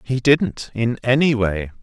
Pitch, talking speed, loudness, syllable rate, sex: 120 Hz, 130 wpm, -19 LUFS, 3.8 syllables/s, male